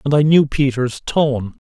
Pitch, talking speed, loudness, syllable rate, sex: 135 Hz, 180 wpm, -17 LUFS, 4.1 syllables/s, male